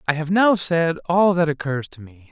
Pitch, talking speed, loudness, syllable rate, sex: 160 Hz, 235 wpm, -19 LUFS, 4.8 syllables/s, male